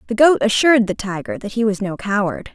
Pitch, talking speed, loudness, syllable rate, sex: 210 Hz, 235 wpm, -18 LUFS, 5.9 syllables/s, female